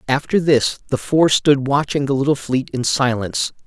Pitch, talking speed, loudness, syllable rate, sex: 135 Hz, 180 wpm, -18 LUFS, 4.9 syllables/s, male